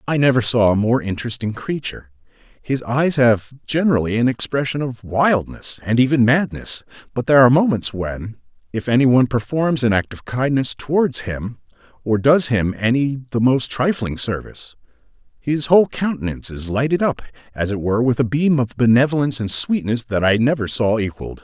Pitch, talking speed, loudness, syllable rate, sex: 125 Hz, 170 wpm, -18 LUFS, 5.5 syllables/s, male